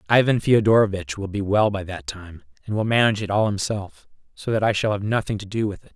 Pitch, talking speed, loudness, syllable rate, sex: 100 Hz, 240 wpm, -22 LUFS, 6.1 syllables/s, male